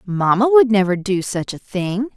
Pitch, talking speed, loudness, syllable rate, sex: 210 Hz, 195 wpm, -17 LUFS, 4.5 syllables/s, female